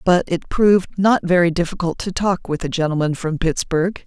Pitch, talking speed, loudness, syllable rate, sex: 175 Hz, 190 wpm, -19 LUFS, 5.3 syllables/s, female